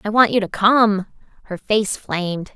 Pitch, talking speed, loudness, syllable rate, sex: 205 Hz, 190 wpm, -18 LUFS, 4.4 syllables/s, female